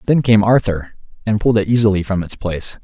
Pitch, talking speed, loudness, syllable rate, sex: 105 Hz, 210 wpm, -16 LUFS, 6.3 syllables/s, male